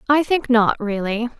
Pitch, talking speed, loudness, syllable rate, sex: 240 Hz, 130 wpm, -19 LUFS, 4.4 syllables/s, female